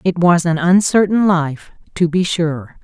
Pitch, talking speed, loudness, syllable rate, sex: 175 Hz, 170 wpm, -15 LUFS, 4.0 syllables/s, female